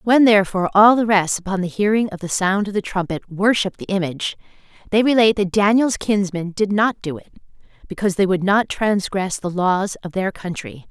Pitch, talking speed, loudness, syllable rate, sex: 195 Hz, 200 wpm, -18 LUFS, 5.6 syllables/s, female